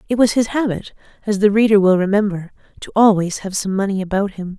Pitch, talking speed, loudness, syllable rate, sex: 200 Hz, 210 wpm, -17 LUFS, 6.1 syllables/s, female